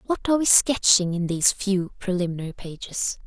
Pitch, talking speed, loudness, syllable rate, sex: 195 Hz, 165 wpm, -22 LUFS, 5.7 syllables/s, female